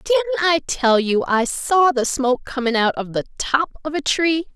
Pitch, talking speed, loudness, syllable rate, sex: 280 Hz, 210 wpm, -19 LUFS, 5.7 syllables/s, female